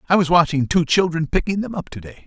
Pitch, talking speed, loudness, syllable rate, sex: 165 Hz, 265 wpm, -19 LUFS, 6.2 syllables/s, male